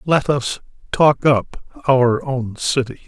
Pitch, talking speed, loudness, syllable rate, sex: 130 Hz, 135 wpm, -18 LUFS, 3.4 syllables/s, male